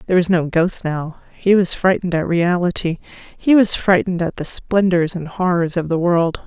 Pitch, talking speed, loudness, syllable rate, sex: 175 Hz, 195 wpm, -17 LUFS, 5.1 syllables/s, female